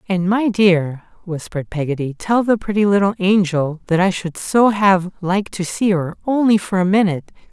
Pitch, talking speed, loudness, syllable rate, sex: 190 Hz, 185 wpm, -17 LUFS, 5.1 syllables/s, male